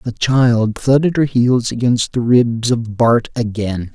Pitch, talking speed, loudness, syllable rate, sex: 120 Hz, 165 wpm, -15 LUFS, 3.7 syllables/s, male